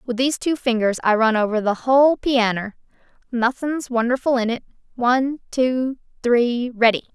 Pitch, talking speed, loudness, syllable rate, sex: 245 Hz, 145 wpm, -20 LUFS, 4.9 syllables/s, female